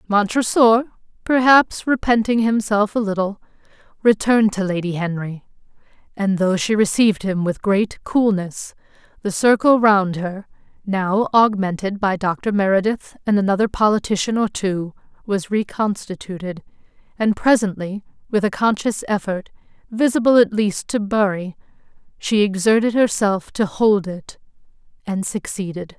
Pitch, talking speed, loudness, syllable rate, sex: 205 Hz, 120 wpm, -19 LUFS, 4.6 syllables/s, female